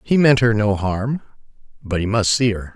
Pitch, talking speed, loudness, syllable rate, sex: 110 Hz, 195 wpm, -18 LUFS, 4.9 syllables/s, male